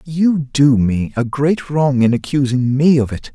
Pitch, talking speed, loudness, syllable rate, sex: 135 Hz, 195 wpm, -15 LUFS, 4.0 syllables/s, male